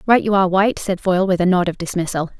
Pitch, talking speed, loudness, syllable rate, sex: 185 Hz, 275 wpm, -18 LUFS, 7.3 syllables/s, female